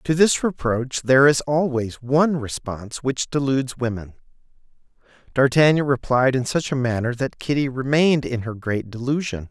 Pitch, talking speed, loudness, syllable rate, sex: 130 Hz, 150 wpm, -21 LUFS, 5.1 syllables/s, male